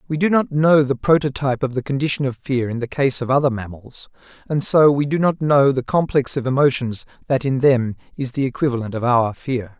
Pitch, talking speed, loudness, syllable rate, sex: 135 Hz, 220 wpm, -19 LUFS, 5.6 syllables/s, male